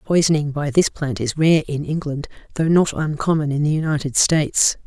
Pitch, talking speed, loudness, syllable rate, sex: 150 Hz, 185 wpm, -19 LUFS, 5.2 syllables/s, female